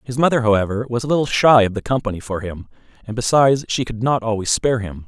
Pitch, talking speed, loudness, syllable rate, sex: 115 Hz, 235 wpm, -18 LUFS, 6.6 syllables/s, male